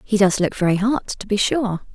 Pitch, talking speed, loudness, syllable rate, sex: 210 Hz, 245 wpm, -20 LUFS, 5.0 syllables/s, female